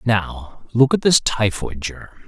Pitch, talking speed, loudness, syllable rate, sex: 110 Hz, 160 wpm, -19 LUFS, 3.7 syllables/s, male